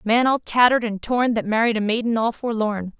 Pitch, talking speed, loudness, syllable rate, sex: 225 Hz, 220 wpm, -20 LUFS, 5.6 syllables/s, female